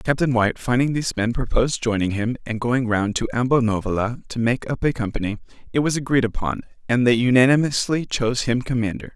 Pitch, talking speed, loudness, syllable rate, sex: 120 Hz, 185 wpm, -21 LUFS, 6.1 syllables/s, male